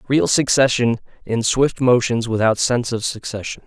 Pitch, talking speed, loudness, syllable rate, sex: 120 Hz, 145 wpm, -18 LUFS, 5.0 syllables/s, male